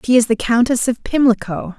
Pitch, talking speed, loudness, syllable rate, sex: 235 Hz, 200 wpm, -16 LUFS, 5.4 syllables/s, female